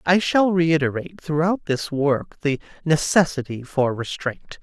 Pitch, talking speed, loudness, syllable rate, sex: 155 Hz, 130 wpm, -21 LUFS, 4.4 syllables/s, male